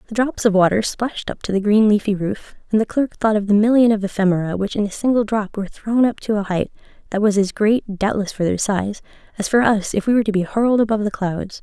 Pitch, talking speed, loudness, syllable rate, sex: 210 Hz, 265 wpm, -19 LUFS, 6.2 syllables/s, female